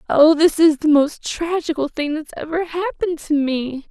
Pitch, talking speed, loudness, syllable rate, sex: 310 Hz, 185 wpm, -18 LUFS, 5.5 syllables/s, female